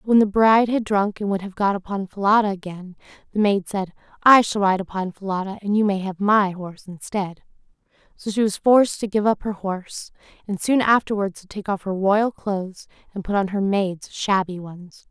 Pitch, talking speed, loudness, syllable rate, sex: 200 Hz, 210 wpm, -21 LUFS, 5.3 syllables/s, female